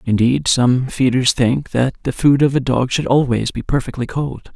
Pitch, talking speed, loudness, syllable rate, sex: 130 Hz, 200 wpm, -17 LUFS, 4.6 syllables/s, male